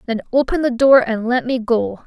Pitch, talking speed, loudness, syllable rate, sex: 245 Hz, 230 wpm, -16 LUFS, 5.0 syllables/s, female